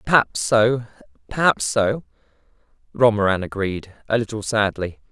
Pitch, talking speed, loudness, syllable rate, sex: 110 Hz, 105 wpm, -20 LUFS, 4.7 syllables/s, male